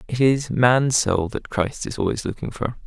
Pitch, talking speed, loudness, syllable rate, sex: 115 Hz, 210 wpm, -21 LUFS, 4.6 syllables/s, male